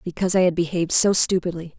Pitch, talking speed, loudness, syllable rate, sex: 175 Hz, 200 wpm, -20 LUFS, 7.1 syllables/s, female